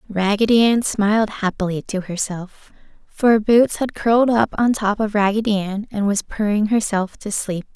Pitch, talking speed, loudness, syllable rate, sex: 210 Hz, 170 wpm, -19 LUFS, 4.7 syllables/s, female